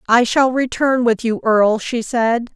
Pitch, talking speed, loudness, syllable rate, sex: 235 Hz, 190 wpm, -16 LUFS, 4.3 syllables/s, female